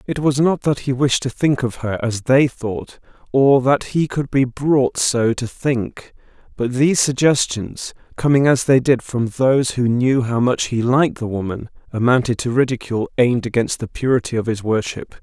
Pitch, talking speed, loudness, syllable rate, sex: 125 Hz, 195 wpm, -18 LUFS, 4.8 syllables/s, male